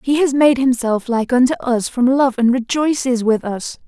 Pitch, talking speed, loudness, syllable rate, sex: 250 Hz, 200 wpm, -16 LUFS, 4.7 syllables/s, female